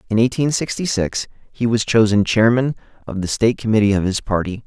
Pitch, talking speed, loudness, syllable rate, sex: 110 Hz, 195 wpm, -18 LUFS, 5.8 syllables/s, male